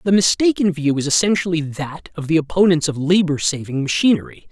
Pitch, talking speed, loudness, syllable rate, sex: 165 Hz, 175 wpm, -18 LUFS, 5.8 syllables/s, male